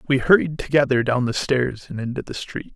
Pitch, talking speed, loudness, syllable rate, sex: 135 Hz, 220 wpm, -21 LUFS, 5.5 syllables/s, male